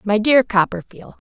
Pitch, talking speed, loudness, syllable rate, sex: 210 Hz, 140 wpm, -16 LUFS, 4.7 syllables/s, female